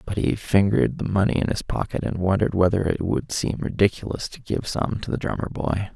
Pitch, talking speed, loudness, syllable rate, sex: 100 Hz, 220 wpm, -23 LUFS, 5.8 syllables/s, male